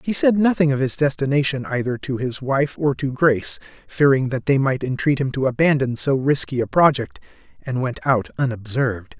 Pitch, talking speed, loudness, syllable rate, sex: 135 Hz, 190 wpm, -20 LUFS, 5.3 syllables/s, male